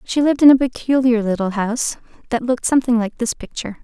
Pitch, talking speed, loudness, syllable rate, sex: 240 Hz, 205 wpm, -17 LUFS, 6.9 syllables/s, female